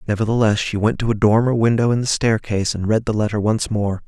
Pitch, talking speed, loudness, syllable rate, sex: 110 Hz, 235 wpm, -18 LUFS, 6.2 syllables/s, male